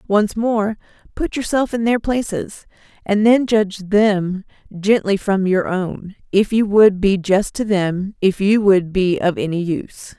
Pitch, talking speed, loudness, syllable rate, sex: 200 Hz, 170 wpm, -17 LUFS, 4.0 syllables/s, female